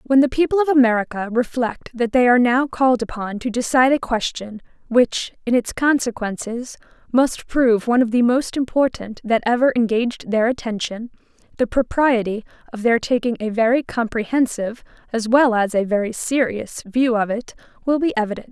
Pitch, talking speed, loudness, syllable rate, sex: 240 Hz, 170 wpm, -19 LUFS, 5.4 syllables/s, female